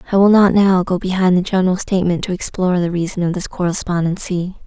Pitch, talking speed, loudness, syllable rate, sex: 180 Hz, 205 wpm, -16 LUFS, 6.4 syllables/s, female